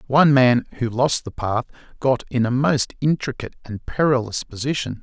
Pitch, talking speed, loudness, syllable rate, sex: 125 Hz, 165 wpm, -20 LUFS, 5.3 syllables/s, male